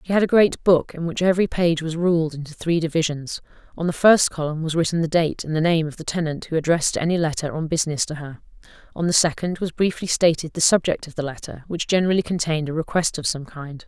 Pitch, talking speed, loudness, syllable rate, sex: 165 Hz, 240 wpm, -21 LUFS, 6.2 syllables/s, female